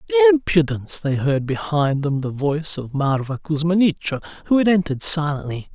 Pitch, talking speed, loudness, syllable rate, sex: 150 Hz, 145 wpm, -20 LUFS, 5.7 syllables/s, male